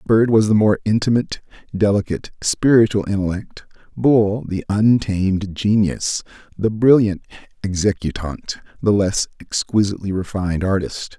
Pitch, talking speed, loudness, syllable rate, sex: 100 Hz, 105 wpm, -18 LUFS, 4.9 syllables/s, male